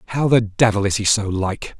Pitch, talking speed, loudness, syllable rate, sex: 110 Hz, 235 wpm, -18 LUFS, 5.3 syllables/s, male